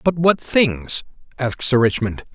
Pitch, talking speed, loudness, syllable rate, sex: 135 Hz, 155 wpm, -19 LUFS, 4.3 syllables/s, male